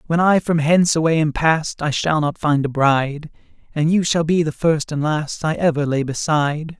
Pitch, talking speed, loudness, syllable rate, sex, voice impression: 155 Hz, 220 wpm, -18 LUFS, 5.0 syllables/s, male, masculine, adult-like, tensed, powerful, soft, clear, raspy, cool, intellectual, friendly, lively, kind, slightly intense, slightly modest